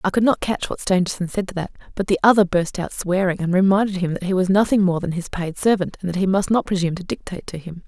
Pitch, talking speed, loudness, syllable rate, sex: 185 Hz, 280 wpm, -20 LUFS, 6.6 syllables/s, female